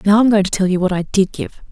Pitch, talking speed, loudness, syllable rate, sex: 195 Hz, 350 wpm, -16 LUFS, 6.5 syllables/s, female